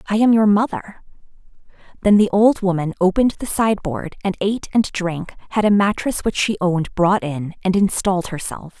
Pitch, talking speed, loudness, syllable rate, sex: 195 Hz, 175 wpm, -18 LUFS, 5.5 syllables/s, female